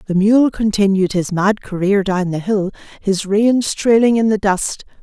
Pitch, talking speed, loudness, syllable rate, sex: 205 Hz, 180 wpm, -16 LUFS, 4.3 syllables/s, female